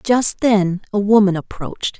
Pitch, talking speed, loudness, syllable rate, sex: 205 Hz, 150 wpm, -17 LUFS, 4.5 syllables/s, female